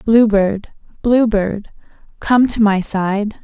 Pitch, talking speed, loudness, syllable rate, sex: 210 Hz, 140 wpm, -15 LUFS, 3.2 syllables/s, female